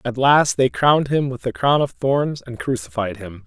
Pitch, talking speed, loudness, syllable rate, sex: 130 Hz, 225 wpm, -19 LUFS, 4.8 syllables/s, male